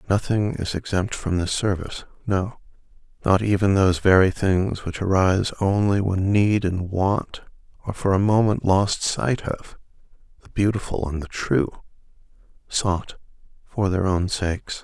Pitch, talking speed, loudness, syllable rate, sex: 95 Hz, 140 wpm, -22 LUFS, 4.5 syllables/s, male